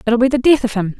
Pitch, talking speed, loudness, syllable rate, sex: 240 Hz, 360 wpm, -15 LUFS, 7.1 syllables/s, female